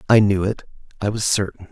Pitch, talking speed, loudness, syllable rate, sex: 100 Hz, 210 wpm, -20 LUFS, 5.8 syllables/s, male